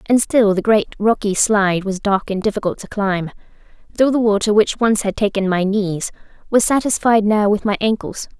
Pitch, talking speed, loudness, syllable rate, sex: 210 Hz, 195 wpm, -17 LUFS, 5.1 syllables/s, female